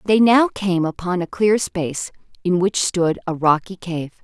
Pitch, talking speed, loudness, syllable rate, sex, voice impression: 185 Hz, 185 wpm, -19 LUFS, 4.4 syllables/s, female, feminine, adult-like, tensed, powerful, bright, clear, slightly fluent, friendly, slightly elegant, lively, slightly intense